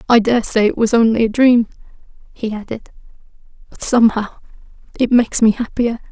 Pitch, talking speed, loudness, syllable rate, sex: 230 Hz, 155 wpm, -15 LUFS, 5.7 syllables/s, female